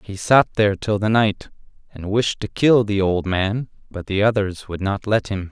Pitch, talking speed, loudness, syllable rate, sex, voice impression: 105 Hz, 220 wpm, -19 LUFS, 4.7 syllables/s, male, masculine, slightly young, slightly thick, tensed, slightly weak, bright, slightly soft, very clear, fluent, cool, intellectual, very refreshing, sincere, calm, very friendly, very reassuring, slightly unique, elegant, wild, slightly sweet, lively, kind, slightly modest